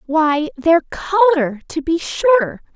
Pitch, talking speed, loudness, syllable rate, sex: 325 Hz, 130 wpm, -17 LUFS, 3.1 syllables/s, female